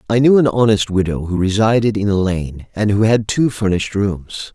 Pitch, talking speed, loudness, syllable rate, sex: 105 Hz, 210 wpm, -16 LUFS, 5.1 syllables/s, male